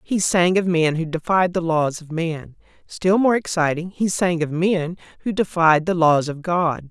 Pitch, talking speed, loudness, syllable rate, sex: 170 Hz, 200 wpm, -20 LUFS, 4.3 syllables/s, female